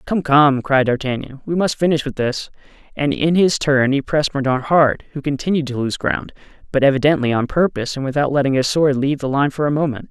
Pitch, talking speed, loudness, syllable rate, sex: 140 Hz, 220 wpm, -18 LUFS, 5.9 syllables/s, male